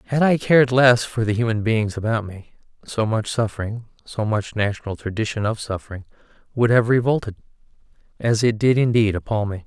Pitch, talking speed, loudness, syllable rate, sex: 110 Hz, 175 wpm, -20 LUFS, 5.6 syllables/s, male